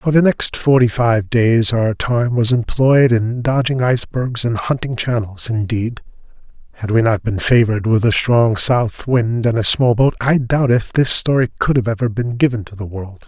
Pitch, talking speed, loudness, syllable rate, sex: 120 Hz, 200 wpm, -16 LUFS, 4.6 syllables/s, male